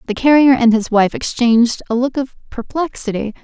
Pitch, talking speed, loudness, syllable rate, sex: 245 Hz, 175 wpm, -15 LUFS, 5.4 syllables/s, female